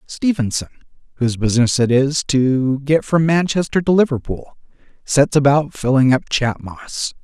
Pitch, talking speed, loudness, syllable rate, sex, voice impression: 140 Hz, 140 wpm, -17 LUFS, 4.6 syllables/s, male, masculine, very adult-like, cool, sincere, calm